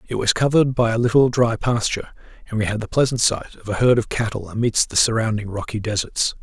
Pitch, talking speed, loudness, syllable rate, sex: 115 Hz, 225 wpm, -20 LUFS, 6.3 syllables/s, male